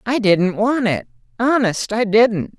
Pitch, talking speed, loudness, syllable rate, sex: 220 Hz, 165 wpm, -17 LUFS, 3.8 syllables/s, female